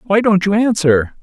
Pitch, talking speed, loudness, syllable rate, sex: 190 Hz, 195 wpm, -14 LUFS, 4.6 syllables/s, male